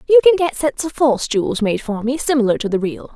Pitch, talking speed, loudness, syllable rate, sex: 265 Hz, 265 wpm, -17 LUFS, 6.2 syllables/s, female